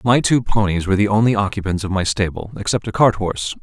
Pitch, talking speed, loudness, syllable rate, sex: 100 Hz, 230 wpm, -18 LUFS, 6.4 syllables/s, male